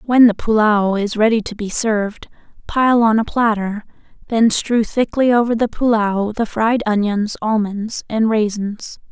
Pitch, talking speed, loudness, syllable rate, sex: 220 Hz, 160 wpm, -17 LUFS, 4.2 syllables/s, female